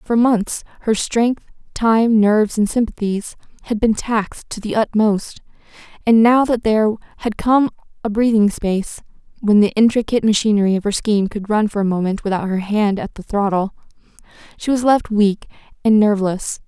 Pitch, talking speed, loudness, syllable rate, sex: 215 Hz, 170 wpm, -17 LUFS, 5.2 syllables/s, female